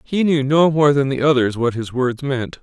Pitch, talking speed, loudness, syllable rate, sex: 135 Hz, 250 wpm, -17 LUFS, 4.7 syllables/s, male